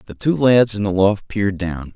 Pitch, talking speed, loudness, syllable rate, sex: 105 Hz, 245 wpm, -18 LUFS, 5.0 syllables/s, male